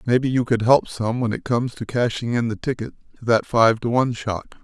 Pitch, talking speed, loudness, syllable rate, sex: 115 Hz, 245 wpm, -21 LUFS, 5.8 syllables/s, male